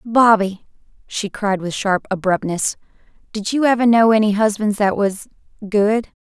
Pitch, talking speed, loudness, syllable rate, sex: 210 Hz, 135 wpm, -17 LUFS, 4.6 syllables/s, female